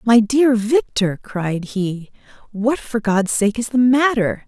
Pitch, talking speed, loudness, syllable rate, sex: 225 Hz, 160 wpm, -18 LUFS, 3.6 syllables/s, female